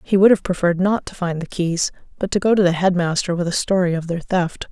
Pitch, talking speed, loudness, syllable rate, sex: 180 Hz, 280 wpm, -19 LUFS, 6.0 syllables/s, female